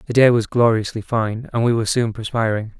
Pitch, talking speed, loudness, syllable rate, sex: 115 Hz, 215 wpm, -19 LUFS, 5.8 syllables/s, male